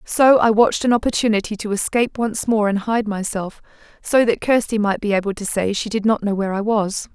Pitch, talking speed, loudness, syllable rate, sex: 215 Hz, 225 wpm, -19 LUFS, 5.7 syllables/s, female